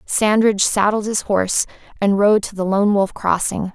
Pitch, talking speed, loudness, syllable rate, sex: 200 Hz, 175 wpm, -17 LUFS, 4.9 syllables/s, female